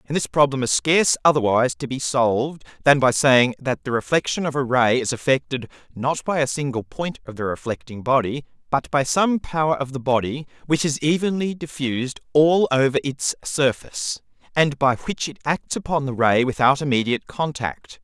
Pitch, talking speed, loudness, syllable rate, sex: 140 Hz, 185 wpm, -21 LUFS, 5.2 syllables/s, male